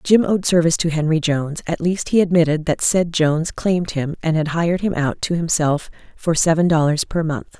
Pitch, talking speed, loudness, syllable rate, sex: 165 Hz, 215 wpm, -18 LUFS, 5.5 syllables/s, female